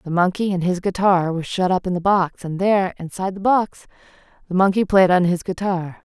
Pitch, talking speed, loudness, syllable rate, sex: 185 Hz, 215 wpm, -19 LUFS, 5.8 syllables/s, female